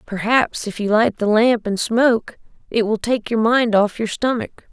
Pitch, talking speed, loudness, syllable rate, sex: 225 Hz, 205 wpm, -18 LUFS, 4.5 syllables/s, female